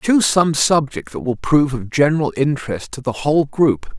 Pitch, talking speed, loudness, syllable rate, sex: 140 Hz, 195 wpm, -17 LUFS, 5.4 syllables/s, male